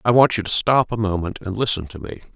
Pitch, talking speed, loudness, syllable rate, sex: 105 Hz, 280 wpm, -20 LUFS, 6.2 syllables/s, male